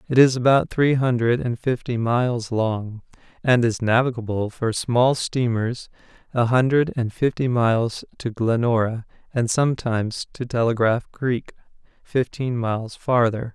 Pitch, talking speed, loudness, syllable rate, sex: 120 Hz, 135 wpm, -22 LUFS, 4.4 syllables/s, male